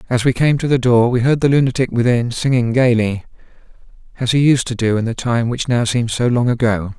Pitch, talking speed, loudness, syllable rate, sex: 120 Hz, 230 wpm, -16 LUFS, 5.7 syllables/s, male